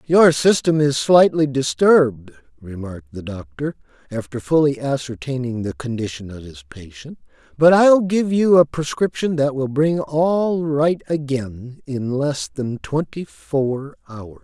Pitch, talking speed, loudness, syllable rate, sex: 140 Hz, 140 wpm, -18 LUFS, 4.1 syllables/s, male